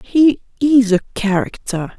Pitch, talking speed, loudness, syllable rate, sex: 225 Hz, 120 wpm, -16 LUFS, 3.9 syllables/s, female